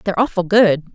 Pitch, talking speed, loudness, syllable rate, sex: 190 Hz, 190 wpm, -16 LUFS, 6.0 syllables/s, female